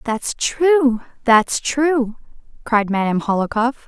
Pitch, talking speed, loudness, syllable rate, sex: 245 Hz, 110 wpm, -18 LUFS, 3.6 syllables/s, female